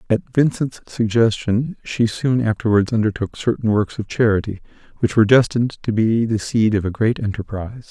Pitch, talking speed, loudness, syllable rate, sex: 110 Hz, 165 wpm, -19 LUFS, 5.3 syllables/s, male